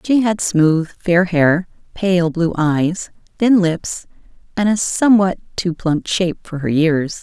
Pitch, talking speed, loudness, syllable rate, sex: 175 Hz, 160 wpm, -17 LUFS, 3.8 syllables/s, female